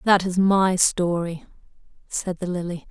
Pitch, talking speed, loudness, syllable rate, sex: 180 Hz, 145 wpm, -22 LUFS, 3.7 syllables/s, female